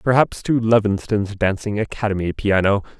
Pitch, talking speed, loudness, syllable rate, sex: 105 Hz, 120 wpm, -19 LUFS, 5.2 syllables/s, male